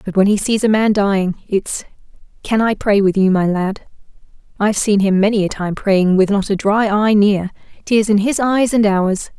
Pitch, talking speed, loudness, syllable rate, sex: 205 Hz, 210 wpm, -15 LUFS, 4.9 syllables/s, female